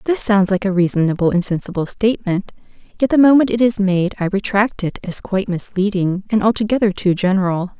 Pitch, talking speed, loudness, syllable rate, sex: 200 Hz, 185 wpm, -17 LUFS, 5.9 syllables/s, female